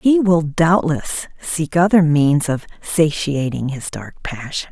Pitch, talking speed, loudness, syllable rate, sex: 160 Hz, 140 wpm, -18 LUFS, 3.7 syllables/s, female